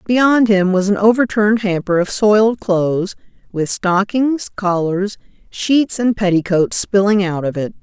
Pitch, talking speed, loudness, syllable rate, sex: 200 Hz, 145 wpm, -16 LUFS, 4.3 syllables/s, female